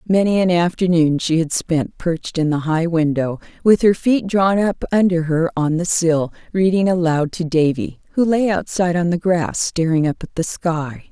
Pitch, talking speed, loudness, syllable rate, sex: 170 Hz, 195 wpm, -18 LUFS, 4.7 syllables/s, female